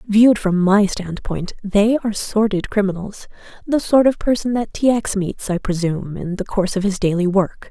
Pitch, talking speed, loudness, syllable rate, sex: 200 Hz, 185 wpm, -18 LUFS, 5.1 syllables/s, female